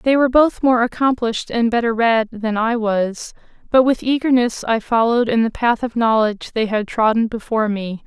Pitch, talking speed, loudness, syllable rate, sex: 230 Hz, 195 wpm, -17 LUFS, 5.2 syllables/s, female